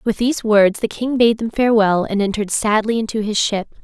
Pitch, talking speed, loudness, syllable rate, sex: 220 Hz, 220 wpm, -17 LUFS, 5.7 syllables/s, female